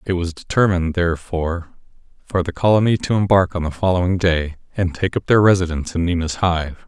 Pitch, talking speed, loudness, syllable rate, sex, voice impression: 90 Hz, 185 wpm, -19 LUFS, 6.0 syllables/s, male, very masculine, very adult-like, slightly old, very thick, relaxed, slightly weak, slightly dark, soft, clear, fluent, very cool, very intellectual, sincere, very calm, very mature, friendly, very reassuring, very unique, elegant, wild, very sweet, slightly lively, very kind, slightly modest